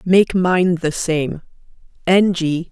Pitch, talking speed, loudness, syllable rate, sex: 175 Hz, 135 wpm, -17 LUFS, 3.1 syllables/s, female